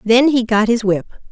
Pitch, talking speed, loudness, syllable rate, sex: 230 Hz, 230 wpm, -15 LUFS, 5.1 syllables/s, female